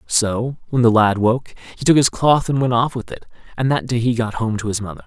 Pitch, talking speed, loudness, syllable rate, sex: 115 Hz, 270 wpm, -18 LUFS, 5.6 syllables/s, male